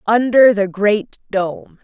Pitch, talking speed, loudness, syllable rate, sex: 210 Hz, 130 wpm, -15 LUFS, 3.1 syllables/s, female